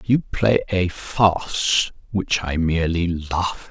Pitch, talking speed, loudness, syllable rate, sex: 90 Hz, 145 wpm, -21 LUFS, 3.6 syllables/s, male